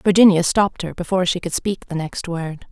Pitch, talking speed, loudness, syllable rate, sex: 180 Hz, 220 wpm, -19 LUFS, 5.8 syllables/s, female